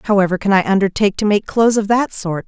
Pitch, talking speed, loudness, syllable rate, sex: 200 Hz, 240 wpm, -16 LUFS, 6.9 syllables/s, female